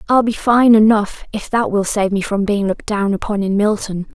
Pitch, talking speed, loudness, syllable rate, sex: 210 Hz, 230 wpm, -16 LUFS, 5.3 syllables/s, female